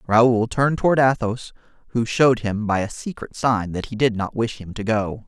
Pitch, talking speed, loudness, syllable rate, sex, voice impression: 115 Hz, 215 wpm, -21 LUFS, 5.1 syllables/s, male, masculine, adult-like, tensed, bright, clear, fluent, intellectual, friendly, unique, wild, lively, slightly sharp